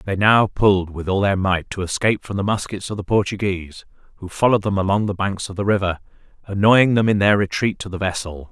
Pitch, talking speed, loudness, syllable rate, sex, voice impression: 100 Hz, 225 wpm, -19 LUFS, 6.0 syllables/s, male, very masculine, middle-aged, thick, slightly relaxed, powerful, slightly dark, soft, slightly muffled, fluent, slightly raspy, cool, very intellectual, slightly refreshing, sincere, calm, mature, very friendly, very reassuring, unique, slightly elegant, wild, slightly sweet, lively, kind, slightly modest